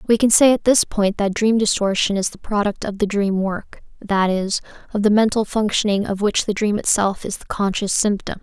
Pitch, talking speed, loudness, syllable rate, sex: 205 Hz, 220 wpm, -19 LUFS, 5.2 syllables/s, female